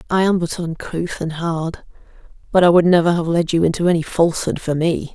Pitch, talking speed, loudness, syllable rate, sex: 170 Hz, 210 wpm, -18 LUFS, 5.6 syllables/s, female